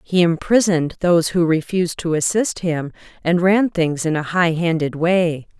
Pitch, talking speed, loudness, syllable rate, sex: 170 Hz, 170 wpm, -18 LUFS, 4.8 syllables/s, female